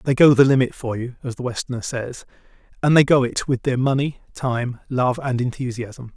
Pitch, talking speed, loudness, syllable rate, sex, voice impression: 125 Hz, 205 wpm, -20 LUFS, 5.2 syllables/s, male, masculine, middle-aged, slightly relaxed, powerful, slightly hard, raspy, intellectual, calm, mature, friendly, wild, lively, strict